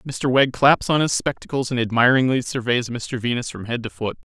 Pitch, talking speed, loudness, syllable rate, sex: 125 Hz, 205 wpm, -20 LUFS, 5.5 syllables/s, male